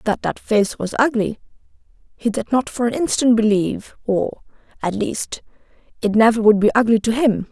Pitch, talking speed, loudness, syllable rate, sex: 225 Hz, 175 wpm, -19 LUFS, 5.1 syllables/s, female